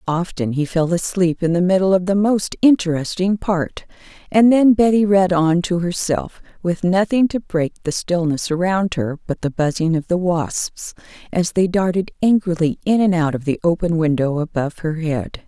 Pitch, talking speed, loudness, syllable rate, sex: 175 Hz, 180 wpm, -18 LUFS, 4.8 syllables/s, female